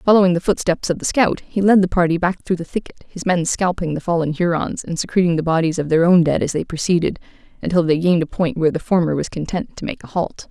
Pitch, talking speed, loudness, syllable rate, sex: 170 Hz, 255 wpm, -19 LUFS, 6.3 syllables/s, female